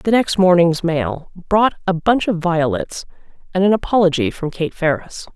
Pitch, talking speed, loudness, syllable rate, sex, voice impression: 175 Hz, 170 wpm, -17 LUFS, 4.7 syllables/s, female, feminine, adult-like, slightly middle-aged, tensed, clear, fluent, intellectual, reassuring, elegant, lively, slightly strict, slightly sharp